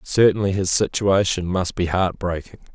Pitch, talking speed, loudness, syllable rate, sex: 95 Hz, 155 wpm, -20 LUFS, 4.8 syllables/s, male